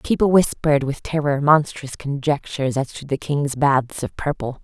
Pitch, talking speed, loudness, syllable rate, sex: 140 Hz, 170 wpm, -20 LUFS, 4.9 syllables/s, female